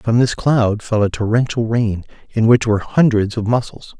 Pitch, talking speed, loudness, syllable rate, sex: 115 Hz, 195 wpm, -17 LUFS, 4.9 syllables/s, male